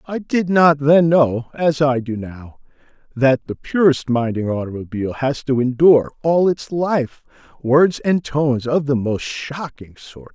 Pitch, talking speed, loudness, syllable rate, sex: 140 Hz, 160 wpm, -18 LUFS, 4.1 syllables/s, male